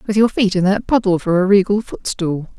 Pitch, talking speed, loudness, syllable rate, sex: 195 Hz, 230 wpm, -16 LUFS, 5.5 syllables/s, female